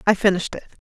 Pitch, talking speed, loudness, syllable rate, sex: 195 Hz, 205 wpm, -21 LUFS, 8.8 syllables/s, female